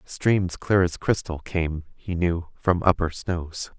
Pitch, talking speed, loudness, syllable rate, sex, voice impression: 90 Hz, 160 wpm, -25 LUFS, 3.5 syllables/s, male, masculine, adult-like, slightly thick, cool, sincere, calm